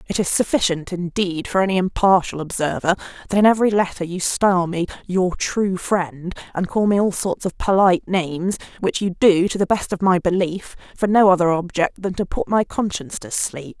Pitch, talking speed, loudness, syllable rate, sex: 185 Hz, 200 wpm, -20 LUFS, 5.3 syllables/s, female